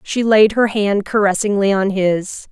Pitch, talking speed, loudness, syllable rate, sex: 205 Hz, 165 wpm, -15 LUFS, 4.6 syllables/s, female